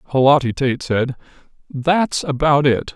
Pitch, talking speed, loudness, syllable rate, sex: 135 Hz, 120 wpm, -17 LUFS, 4.0 syllables/s, male